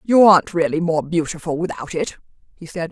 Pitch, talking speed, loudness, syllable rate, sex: 170 Hz, 185 wpm, -18 LUFS, 5.6 syllables/s, female